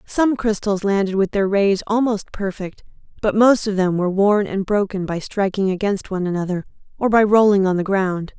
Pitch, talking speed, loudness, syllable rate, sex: 200 Hz, 195 wpm, -19 LUFS, 5.2 syllables/s, female